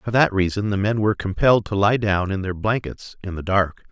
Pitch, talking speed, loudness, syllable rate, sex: 100 Hz, 245 wpm, -21 LUFS, 5.7 syllables/s, male